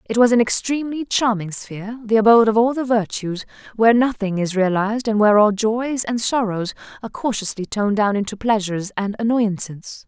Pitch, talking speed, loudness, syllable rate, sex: 215 Hz, 180 wpm, -19 LUFS, 5.7 syllables/s, female